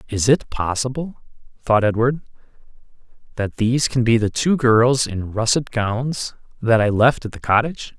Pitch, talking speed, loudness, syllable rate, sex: 120 Hz, 160 wpm, -19 LUFS, 4.6 syllables/s, male